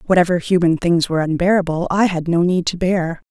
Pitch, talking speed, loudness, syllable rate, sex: 175 Hz, 200 wpm, -17 LUFS, 5.9 syllables/s, female